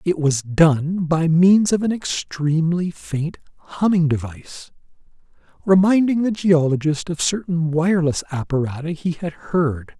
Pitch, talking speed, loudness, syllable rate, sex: 165 Hz, 125 wpm, -19 LUFS, 4.4 syllables/s, male